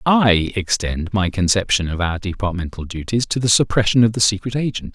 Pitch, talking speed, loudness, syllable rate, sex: 100 Hz, 180 wpm, -18 LUFS, 5.4 syllables/s, male